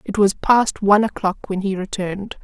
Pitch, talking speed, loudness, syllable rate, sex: 200 Hz, 195 wpm, -19 LUFS, 5.2 syllables/s, female